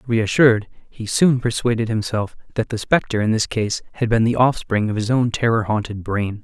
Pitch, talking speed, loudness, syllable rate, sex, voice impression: 115 Hz, 195 wpm, -19 LUFS, 5.3 syllables/s, male, masculine, adult-like, slightly cool, refreshing, slightly calm, slightly unique, slightly kind